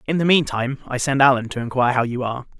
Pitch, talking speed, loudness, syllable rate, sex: 130 Hz, 275 wpm, -19 LUFS, 7.1 syllables/s, male